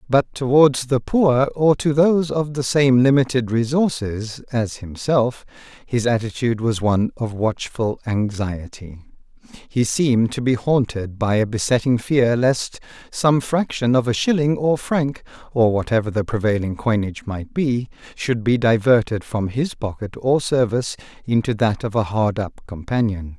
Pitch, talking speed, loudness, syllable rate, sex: 120 Hz, 155 wpm, -20 LUFS, 4.5 syllables/s, male